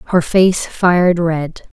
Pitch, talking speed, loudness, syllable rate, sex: 175 Hz, 135 wpm, -14 LUFS, 3.0 syllables/s, female